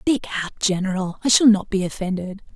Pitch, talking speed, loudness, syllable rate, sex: 200 Hz, 190 wpm, -20 LUFS, 5.6 syllables/s, female